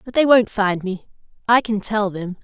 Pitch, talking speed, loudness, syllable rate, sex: 210 Hz, 220 wpm, -18 LUFS, 4.7 syllables/s, female